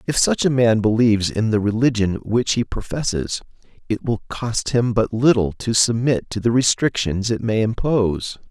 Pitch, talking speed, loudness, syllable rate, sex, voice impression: 115 Hz, 175 wpm, -19 LUFS, 4.8 syllables/s, male, masculine, adult-like, thick, tensed, powerful, slightly hard, slightly raspy, cool, intellectual, calm, mature, reassuring, wild, lively, slightly strict